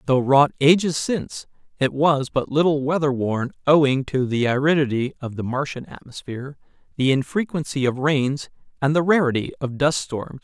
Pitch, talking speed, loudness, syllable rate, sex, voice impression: 140 Hz, 160 wpm, -21 LUFS, 5.1 syllables/s, male, very masculine, adult-like, slightly middle-aged, thick, tensed, powerful, very bright, slightly hard, very clear, fluent, cool, intellectual, very refreshing